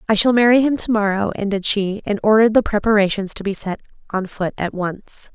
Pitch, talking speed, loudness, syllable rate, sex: 210 Hz, 215 wpm, -18 LUFS, 5.6 syllables/s, female